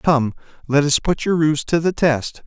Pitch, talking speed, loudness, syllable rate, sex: 150 Hz, 220 wpm, -18 LUFS, 4.3 syllables/s, male